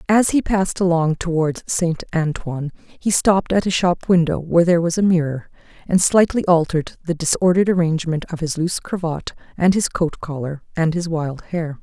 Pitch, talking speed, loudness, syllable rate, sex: 170 Hz, 185 wpm, -19 LUFS, 5.5 syllables/s, female